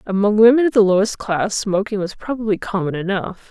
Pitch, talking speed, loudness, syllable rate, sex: 205 Hz, 190 wpm, -18 LUFS, 5.6 syllables/s, female